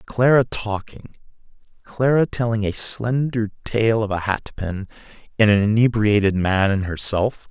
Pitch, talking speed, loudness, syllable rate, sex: 110 Hz, 135 wpm, -20 LUFS, 4.4 syllables/s, male